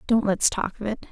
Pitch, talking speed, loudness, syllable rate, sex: 205 Hz, 270 wpm, -24 LUFS, 5.7 syllables/s, female